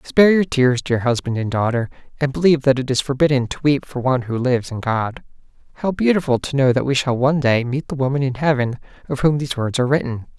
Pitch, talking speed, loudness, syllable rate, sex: 135 Hz, 235 wpm, -19 LUFS, 6.4 syllables/s, male